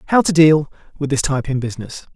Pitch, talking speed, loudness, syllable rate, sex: 145 Hz, 220 wpm, -17 LUFS, 7.0 syllables/s, male